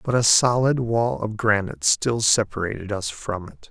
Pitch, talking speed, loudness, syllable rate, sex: 105 Hz, 180 wpm, -21 LUFS, 4.7 syllables/s, male